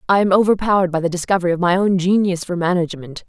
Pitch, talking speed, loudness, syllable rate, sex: 180 Hz, 220 wpm, -17 LUFS, 7.4 syllables/s, female